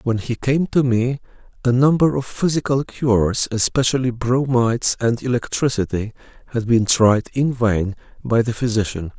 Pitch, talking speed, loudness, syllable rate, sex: 120 Hz, 145 wpm, -19 LUFS, 4.8 syllables/s, male